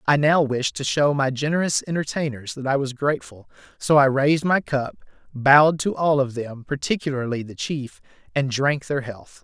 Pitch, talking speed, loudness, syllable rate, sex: 140 Hz, 185 wpm, -21 LUFS, 5.1 syllables/s, male